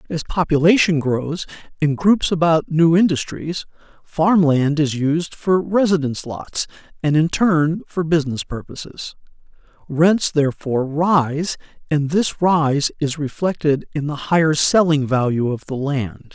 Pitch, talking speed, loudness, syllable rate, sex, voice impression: 155 Hz, 135 wpm, -18 LUFS, 4.2 syllables/s, male, very masculine, very adult-like, slightly old, very thick, tensed, very powerful, bright, hard, very clear, fluent, slightly raspy, cool, intellectual, very sincere, very calm, very mature, very friendly, reassuring, unique, slightly elegant, slightly wild, sweet, lively, kind, slightly modest